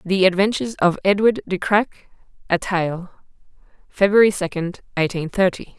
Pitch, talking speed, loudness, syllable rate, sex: 190 Hz, 125 wpm, -19 LUFS, 4.9 syllables/s, female